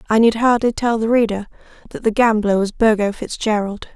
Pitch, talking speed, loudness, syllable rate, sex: 220 Hz, 180 wpm, -17 LUFS, 5.6 syllables/s, female